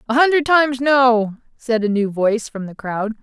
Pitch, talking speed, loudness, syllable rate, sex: 240 Hz, 205 wpm, -17 LUFS, 5.0 syllables/s, female